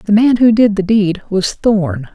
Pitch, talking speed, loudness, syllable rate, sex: 205 Hz, 225 wpm, -13 LUFS, 4.0 syllables/s, female